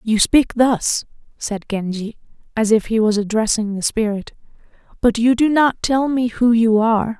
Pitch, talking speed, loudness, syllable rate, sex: 225 Hz, 175 wpm, -17 LUFS, 4.5 syllables/s, female